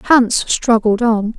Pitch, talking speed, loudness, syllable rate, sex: 230 Hz, 130 wpm, -14 LUFS, 3.0 syllables/s, female